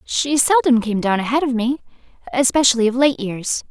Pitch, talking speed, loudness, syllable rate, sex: 255 Hz, 180 wpm, -17 LUFS, 5.3 syllables/s, female